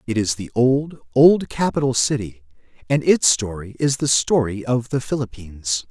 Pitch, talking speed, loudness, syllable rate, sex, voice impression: 120 Hz, 165 wpm, -19 LUFS, 4.7 syllables/s, male, masculine, middle-aged, tensed, powerful, bright, clear, cool, intellectual, calm, friendly, reassuring, wild, lively, kind